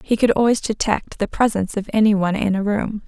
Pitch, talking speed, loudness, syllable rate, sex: 210 Hz, 235 wpm, -19 LUFS, 6.1 syllables/s, female